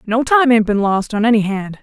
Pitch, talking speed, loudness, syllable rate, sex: 225 Hz, 265 wpm, -15 LUFS, 5.3 syllables/s, female